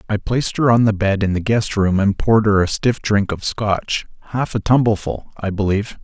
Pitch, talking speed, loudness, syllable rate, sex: 105 Hz, 220 wpm, -18 LUFS, 5.2 syllables/s, male